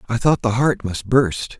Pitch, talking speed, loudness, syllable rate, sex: 115 Hz, 225 wpm, -19 LUFS, 4.3 syllables/s, male